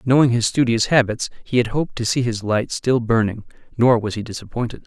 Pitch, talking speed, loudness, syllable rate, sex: 120 Hz, 210 wpm, -19 LUFS, 5.8 syllables/s, male